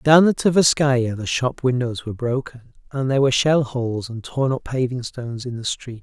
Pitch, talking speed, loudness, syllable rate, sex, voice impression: 130 Hz, 210 wpm, -21 LUFS, 5.1 syllables/s, male, very masculine, adult-like, slightly tensed, powerful, dark, soft, clear, fluent, cool, intellectual, very refreshing, sincere, very calm, mature, friendly, very reassuring, unique, slightly elegant, wild, sweet, lively, very kind, slightly intense